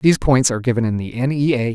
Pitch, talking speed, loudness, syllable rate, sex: 125 Hz, 310 wpm, -18 LUFS, 6.8 syllables/s, male